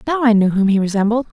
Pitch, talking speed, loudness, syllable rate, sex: 220 Hz, 260 wpm, -15 LUFS, 7.0 syllables/s, female